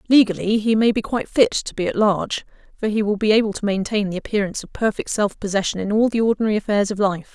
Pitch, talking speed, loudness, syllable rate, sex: 210 Hz, 245 wpm, -20 LUFS, 6.7 syllables/s, female